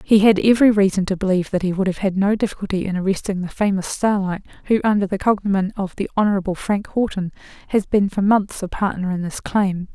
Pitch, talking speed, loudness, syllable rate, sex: 195 Hz, 215 wpm, -20 LUFS, 6.2 syllables/s, female